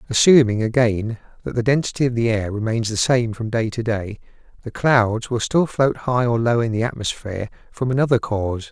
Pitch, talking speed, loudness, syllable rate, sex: 115 Hz, 200 wpm, -20 LUFS, 5.4 syllables/s, male